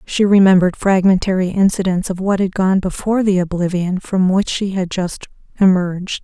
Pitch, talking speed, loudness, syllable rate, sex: 190 Hz, 165 wpm, -16 LUFS, 5.3 syllables/s, female